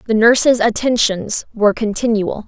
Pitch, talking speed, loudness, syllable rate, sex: 220 Hz, 120 wpm, -15 LUFS, 4.9 syllables/s, female